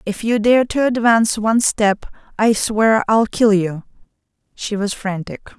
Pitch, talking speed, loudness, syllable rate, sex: 215 Hz, 160 wpm, -17 LUFS, 4.3 syllables/s, female